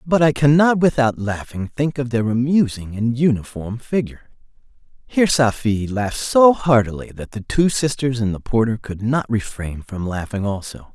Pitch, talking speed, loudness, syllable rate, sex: 120 Hz, 165 wpm, -19 LUFS, 4.9 syllables/s, male